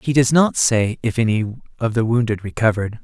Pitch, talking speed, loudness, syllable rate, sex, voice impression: 115 Hz, 200 wpm, -18 LUFS, 5.5 syllables/s, male, very masculine, adult-like, slightly middle-aged, very thick, tensed, powerful, slightly bright, soft, slightly muffled, fluent, cool, very intellectual, refreshing, very sincere, very calm, mature, friendly, reassuring, slightly unique, elegant, slightly wild, slightly sweet, lively, very kind, modest